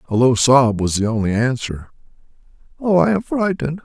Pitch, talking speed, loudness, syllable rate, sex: 130 Hz, 170 wpm, -17 LUFS, 5.5 syllables/s, male